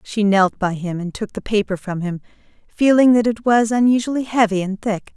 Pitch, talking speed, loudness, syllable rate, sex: 210 Hz, 210 wpm, -18 LUFS, 5.2 syllables/s, female